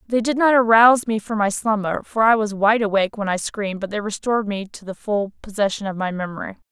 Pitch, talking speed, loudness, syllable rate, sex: 210 Hz, 225 wpm, -20 LUFS, 6.2 syllables/s, female